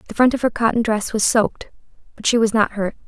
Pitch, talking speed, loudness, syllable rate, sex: 220 Hz, 255 wpm, -19 LUFS, 6.4 syllables/s, female